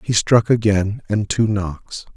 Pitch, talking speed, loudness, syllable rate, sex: 105 Hz, 165 wpm, -18 LUFS, 3.6 syllables/s, male